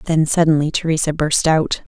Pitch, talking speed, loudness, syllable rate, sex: 155 Hz, 155 wpm, -17 LUFS, 5.3 syllables/s, female